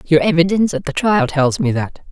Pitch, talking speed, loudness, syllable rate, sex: 170 Hz, 225 wpm, -16 LUFS, 5.6 syllables/s, female